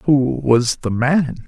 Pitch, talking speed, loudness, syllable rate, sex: 135 Hz, 165 wpm, -17 LUFS, 3.0 syllables/s, male